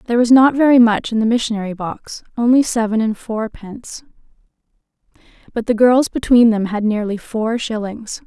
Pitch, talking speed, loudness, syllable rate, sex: 225 Hz, 160 wpm, -16 LUFS, 5.3 syllables/s, female